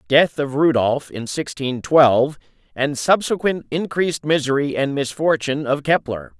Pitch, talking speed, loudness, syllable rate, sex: 145 Hz, 130 wpm, -19 LUFS, 4.7 syllables/s, male